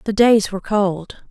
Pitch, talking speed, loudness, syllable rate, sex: 205 Hz, 185 wpm, -17 LUFS, 4.4 syllables/s, female